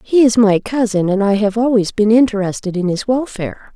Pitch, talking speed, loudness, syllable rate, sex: 215 Hz, 210 wpm, -15 LUFS, 5.7 syllables/s, female